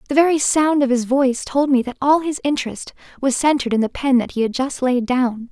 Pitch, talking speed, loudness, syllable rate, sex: 265 Hz, 250 wpm, -18 LUFS, 5.8 syllables/s, female